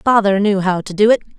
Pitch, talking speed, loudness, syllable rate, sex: 200 Hz, 260 wpm, -15 LUFS, 6.4 syllables/s, female